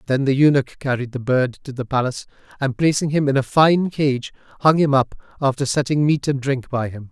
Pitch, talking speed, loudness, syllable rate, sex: 135 Hz, 220 wpm, -19 LUFS, 5.5 syllables/s, male